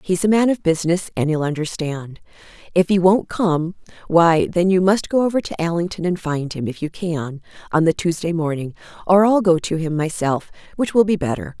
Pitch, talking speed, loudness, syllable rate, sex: 170 Hz, 205 wpm, -19 LUFS, 5.3 syllables/s, female